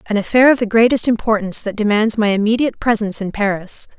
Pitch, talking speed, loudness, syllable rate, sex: 215 Hz, 195 wpm, -16 LUFS, 6.6 syllables/s, female